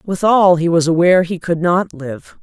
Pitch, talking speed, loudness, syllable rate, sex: 175 Hz, 200 wpm, -14 LUFS, 4.8 syllables/s, female